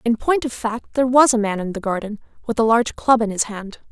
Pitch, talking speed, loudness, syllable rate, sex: 230 Hz, 275 wpm, -19 LUFS, 6.1 syllables/s, female